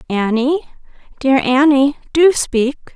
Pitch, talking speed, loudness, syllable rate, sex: 270 Hz, 100 wpm, -15 LUFS, 3.6 syllables/s, female